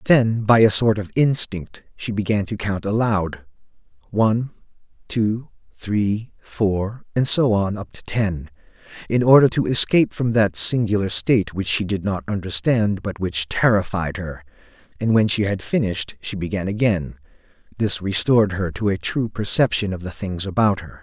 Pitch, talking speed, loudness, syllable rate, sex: 105 Hz, 165 wpm, -20 LUFS, 4.7 syllables/s, male